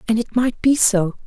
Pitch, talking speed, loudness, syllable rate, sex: 225 Hz, 240 wpm, -18 LUFS, 4.9 syllables/s, female